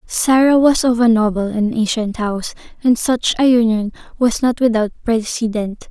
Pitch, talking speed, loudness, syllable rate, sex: 230 Hz, 165 wpm, -16 LUFS, 4.7 syllables/s, female